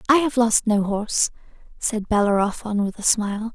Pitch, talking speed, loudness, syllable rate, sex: 220 Hz, 170 wpm, -21 LUFS, 5.2 syllables/s, female